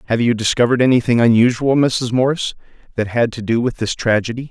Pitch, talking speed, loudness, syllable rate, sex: 120 Hz, 185 wpm, -16 LUFS, 6.1 syllables/s, male